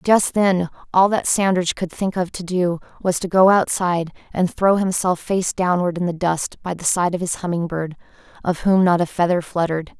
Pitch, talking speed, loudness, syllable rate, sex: 180 Hz, 210 wpm, -19 LUFS, 5.1 syllables/s, female